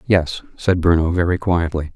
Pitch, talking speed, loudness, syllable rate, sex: 85 Hz, 155 wpm, -18 LUFS, 4.8 syllables/s, male